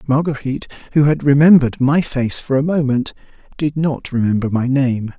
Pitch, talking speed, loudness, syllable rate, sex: 140 Hz, 160 wpm, -16 LUFS, 5.3 syllables/s, male